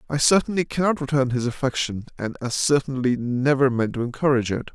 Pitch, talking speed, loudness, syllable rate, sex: 135 Hz, 175 wpm, -22 LUFS, 6.0 syllables/s, male